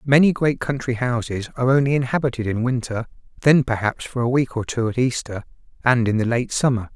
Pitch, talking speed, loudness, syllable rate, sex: 125 Hz, 200 wpm, -21 LUFS, 5.8 syllables/s, male